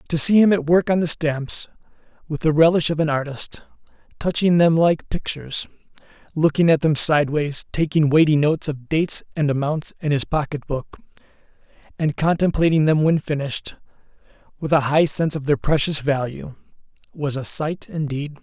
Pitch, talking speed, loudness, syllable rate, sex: 155 Hz, 165 wpm, -20 LUFS, 5.3 syllables/s, male